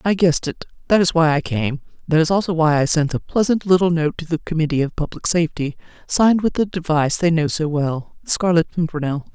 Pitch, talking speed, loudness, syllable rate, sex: 165 Hz, 225 wpm, -19 LUFS, 6.0 syllables/s, female